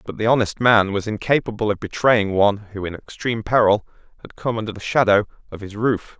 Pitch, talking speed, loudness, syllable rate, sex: 110 Hz, 205 wpm, -20 LUFS, 5.9 syllables/s, male